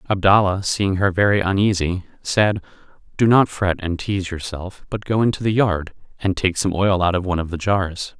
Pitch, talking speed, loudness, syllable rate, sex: 95 Hz, 200 wpm, -20 LUFS, 5.2 syllables/s, male